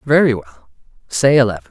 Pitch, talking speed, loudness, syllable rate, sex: 120 Hz, 140 wpm, -15 LUFS, 5.9 syllables/s, male